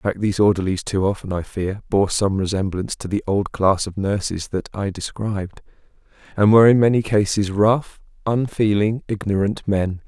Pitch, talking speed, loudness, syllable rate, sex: 100 Hz, 175 wpm, -20 LUFS, 5.3 syllables/s, male